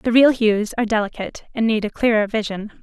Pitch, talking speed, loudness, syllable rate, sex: 220 Hz, 210 wpm, -19 LUFS, 6.0 syllables/s, female